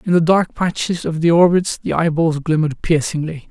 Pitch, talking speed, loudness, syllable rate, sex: 165 Hz, 190 wpm, -17 LUFS, 5.3 syllables/s, male